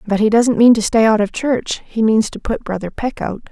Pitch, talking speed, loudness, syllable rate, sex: 220 Hz, 275 wpm, -16 LUFS, 5.2 syllables/s, female